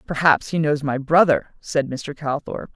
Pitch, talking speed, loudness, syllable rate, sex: 150 Hz, 175 wpm, -20 LUFS, 4.3 syllables/s, female